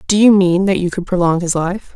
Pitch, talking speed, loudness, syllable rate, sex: 185 Hz, 275 wpm, -14 LUFS, 5.6 syllables/s, female